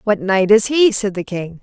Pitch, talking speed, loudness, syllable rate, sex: 205 Hz, 260 wpm, -15 LUFS, 4.6 syllables/s, female